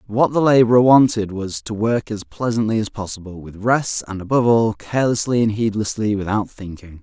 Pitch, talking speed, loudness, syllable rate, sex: 110 Hz, 180 wpm, -18 LUFS, 5.4 syllables/s, male